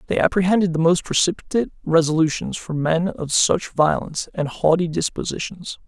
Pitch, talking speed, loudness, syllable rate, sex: 170 Hz, 145 wpm, -20 LUFS, 5.4 syllables/s, male